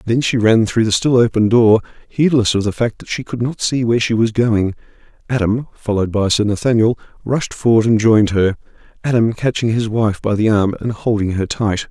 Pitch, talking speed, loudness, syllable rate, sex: 110 Hz, 205 wpm, -16 LUFS, 5.5 syllables/s, male